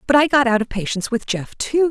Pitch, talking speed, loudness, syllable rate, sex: 245 Hz, 285 wpm, -19 LUFS, 6.2 syllables/s, female